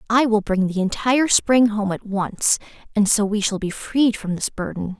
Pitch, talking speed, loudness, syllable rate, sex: 210 Hz, 215 wpm, -20 LUFS, 4.7 syllables/s, female